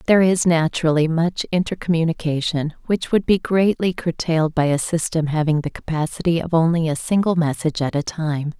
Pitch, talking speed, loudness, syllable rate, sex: 165 Hz, 170 wpm, -20 LUFS, 5.6 syllables/s, female